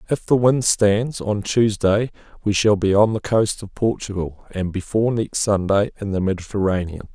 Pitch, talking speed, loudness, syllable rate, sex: 105 Hz, 175 wpm, -20 LUFS, 4.8 syllables/s, male